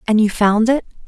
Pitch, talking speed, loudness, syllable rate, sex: 225 Hz, 225 wpm, -16 LUFS, 5.4 syllables/s, female